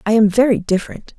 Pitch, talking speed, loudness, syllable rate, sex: 215 Hz, 205 wpm, -16 LUFS, 6.6 syllables/s, female